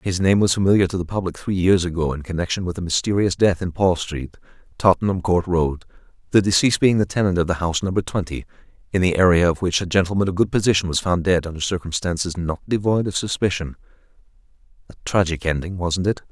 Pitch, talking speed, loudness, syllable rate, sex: 90 Hz, 205 wpm, -20 LUFS, 6.4 syllables/s, male